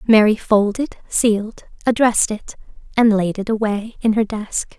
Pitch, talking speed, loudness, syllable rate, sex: 215 Hz, 150 wpm, -18 LUFS, 4.8 syllables/s, female